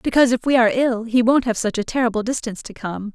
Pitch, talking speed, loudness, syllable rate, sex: 235 Hz, 265 wpm, -19 LUFS, 6.8 syllables/s, female